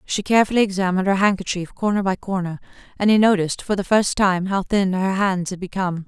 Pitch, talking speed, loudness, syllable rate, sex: 190 Hz, 210 wpm, -20 LUFS, 6.3 syllables/s, female